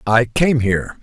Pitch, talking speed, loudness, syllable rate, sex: 120 Hz, 175 wpm, -16 LUFS, 4.4 syllables/s, male